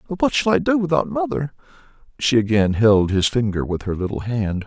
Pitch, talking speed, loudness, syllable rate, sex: 120 Hz, 205 wpm, -19 LUFS, 5.5 syllables/s, male